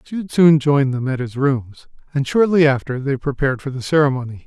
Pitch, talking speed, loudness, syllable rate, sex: 140 Hz, 200 wpm, -18 LUFS, 5.6 syllables/s, male